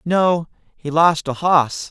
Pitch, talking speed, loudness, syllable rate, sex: 160 Hz, 155 wpm, -17 LUFS, 3.2 syllables/s, male